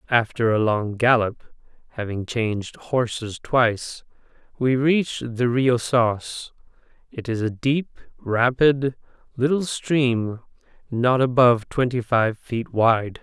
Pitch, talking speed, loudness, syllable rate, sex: 120 Hz, 120 wpm, -22 LUFS, 3.8 syllables/s, male